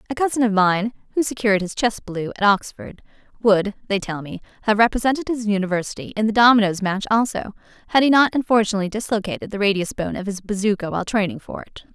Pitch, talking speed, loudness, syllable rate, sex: 210 Hz, 195 wpm, -20 LUFS, 6.5 syllables/s, female